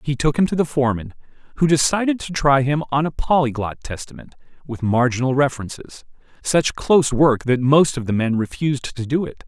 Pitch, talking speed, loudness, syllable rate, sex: 135 Hz, 190 wpm, -19 LUFS, 5.6 syllables/s, male